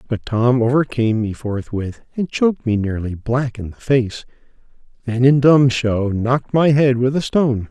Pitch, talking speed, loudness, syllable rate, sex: 120 Hz, 170 wpm, -18 LUFS, 4.7 syllables/s, male